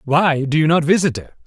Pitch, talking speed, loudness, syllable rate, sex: 155 Hz, 245 wpm, -16 LUFS, 5.4 syllables/s, male